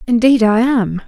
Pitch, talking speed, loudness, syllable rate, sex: 235 Hz, 165 wpm, -13 LUFS, 4.4 syllables/s, female